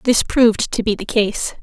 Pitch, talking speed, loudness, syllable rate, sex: 220 Hz, 220 wpm, -17 LUFS, 5.0 syllables/s, female